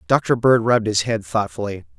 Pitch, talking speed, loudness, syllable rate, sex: 110 Hz, 180 wpm, -19 LUFS, 5.3 syllables/s, male